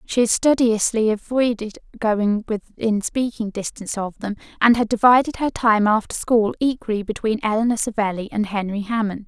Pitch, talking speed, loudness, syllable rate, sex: 220 Hz, 155 wpm, -20 LUFS, 5.2 syllables/s, female